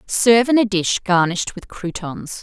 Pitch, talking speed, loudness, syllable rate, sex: 200 Hz, 175 wpm, -18 LUFS, 4.8 syllables/s, female